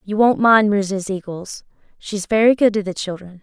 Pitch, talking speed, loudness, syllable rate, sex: 200 Hz, 195 wpm, -17 LUFS, 4.7 syllables/s, female